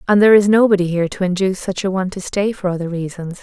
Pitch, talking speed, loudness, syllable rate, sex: 190 Hz, 260 wpm, -17 LUFS, 7.4 syllables/s, female